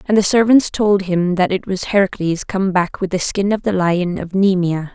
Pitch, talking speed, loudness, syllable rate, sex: 190 Hz, 230 wpm, -17 LUFS, 4.8 syllables/s, female